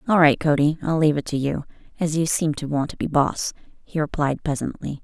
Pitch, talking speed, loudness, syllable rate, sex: 150 Hz, 225 wpm, -22 LUFS, 5.9 syllables/s, female